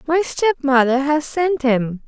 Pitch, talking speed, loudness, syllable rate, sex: 285 Hz, 145 wpm, -18 LUFS, 3.7 syllables/s, female